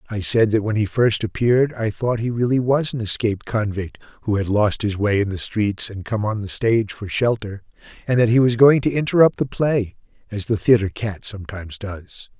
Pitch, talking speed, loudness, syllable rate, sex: 110 Hz, 220 wpm, -20 LUFS, 5.5 syllables/s, male